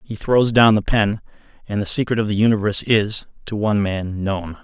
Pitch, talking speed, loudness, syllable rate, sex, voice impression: 105 Hz, 205 wpm, -19 LUFS, 5.4 syllables/s, male, very masculine, very adult-like, slightly old, thick, tensed, very powerful, slightly dark, slightly hard, slightly muffled, fluent, slightly raspy, cool, intellectual, sincere, very calm, very mature, friendly, reassuring, unique, slightly elegant, wild, slightly sweet, slightly lively, slightly strict, slightly modest